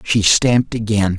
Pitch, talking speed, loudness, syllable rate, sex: 105 Hz, 150 wpm, -15 LUFS, 4.6 syllables/s, male